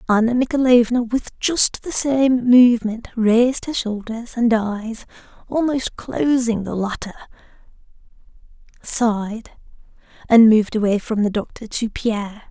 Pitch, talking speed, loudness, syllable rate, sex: 230 Hz, 120 wpm, -18 LUFS, 4.4 syllables/s, female